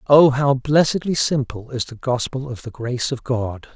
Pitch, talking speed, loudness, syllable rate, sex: 130 Hz, 190 wpm, -20 LUFS, 4.8 syllables/s, male